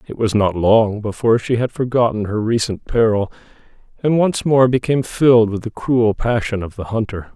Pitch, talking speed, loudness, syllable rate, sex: 115 Hz, 190 wpm, -17 LUFS, 5.2 syllables/s, male